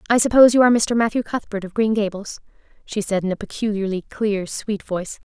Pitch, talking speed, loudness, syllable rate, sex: 210 Hz, 205 wpm, -20 LUFS, 6.1 syllables/s, female